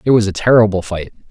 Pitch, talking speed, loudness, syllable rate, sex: 100 Hz, 230 wpm, -14 LUFS, 6.7 syllables/s, male